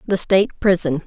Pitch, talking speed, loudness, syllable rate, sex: 180 Hz, 170 wpm, -17 LUFS, 6.7 syllables/s, female